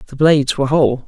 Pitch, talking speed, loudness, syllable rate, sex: 140 Hz, 225 wpm, -15 LUFS, 8.2 syllables/s, male